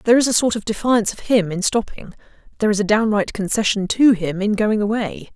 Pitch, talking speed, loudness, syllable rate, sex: 210 Hz, 225 wpm, -18 LUFS, 6.1 syllables/s, female